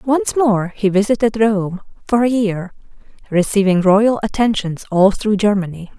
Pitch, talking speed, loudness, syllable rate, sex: 205 Hz, 140 wpm, -16 LUFS, 4.4 syllables/s, female